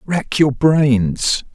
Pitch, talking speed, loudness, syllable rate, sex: 135 Hz, 115 wpm, -16 LUFS, 2.2 syllables/s, male